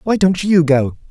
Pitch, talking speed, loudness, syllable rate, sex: 165 Hz, 215 wpm, -14 LUFS, 4.4 syllables/s, male